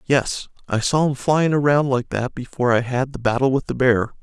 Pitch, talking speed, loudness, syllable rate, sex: 130 Hz, 225 wpm, -20 LUFS, 5.2 syllables/s, male